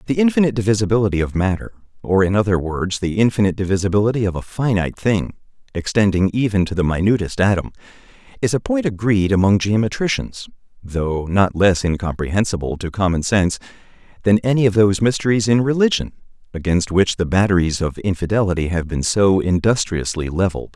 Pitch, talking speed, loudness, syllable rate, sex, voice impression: 100 Hz, 155 wpm, -18 LUFS, 6.1 syllables/s, male, very masculine, very adult-like, slightly middle-aged, very thick, very tensed, very powerful, bright, soft, clear, fluent, very cool, intellectual, sincere, calm, very mature, very friendly, very reassuring, slightly elegant, slightly wild, slightly sweet, lively, kind, slightly intense